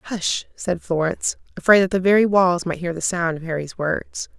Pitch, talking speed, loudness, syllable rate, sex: 180 Hz, 205 wpm, -20 LUFS, 5.0 syllables/s, female